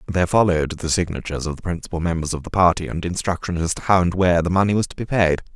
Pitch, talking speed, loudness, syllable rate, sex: 85 Hz, 260 wpm, -20 LUFS, 7.2 syllables/s, male